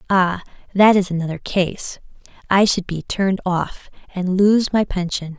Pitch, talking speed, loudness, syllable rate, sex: 185 Hz, 155 wpm, -19 LUFS, 4.3 syllables/s, female